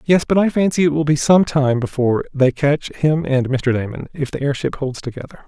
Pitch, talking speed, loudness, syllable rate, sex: 145 Hz, 230 wpm, -18 LUFS, 5.6 syllables/s, male